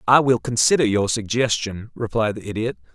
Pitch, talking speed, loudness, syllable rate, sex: 115 Hz, 165 wpm, -20 LUFS, 5.3 syllables/s, male